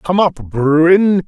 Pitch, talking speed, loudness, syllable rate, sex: 165 Hz, 140 wpm, -13 LUFS, 2.6 syllables/s, male